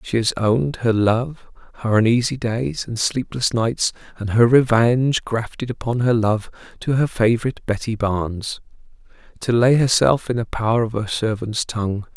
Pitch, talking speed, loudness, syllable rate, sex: 115 Hz, 160 wpm, -20 LUFS, 4.8 syllables/s, male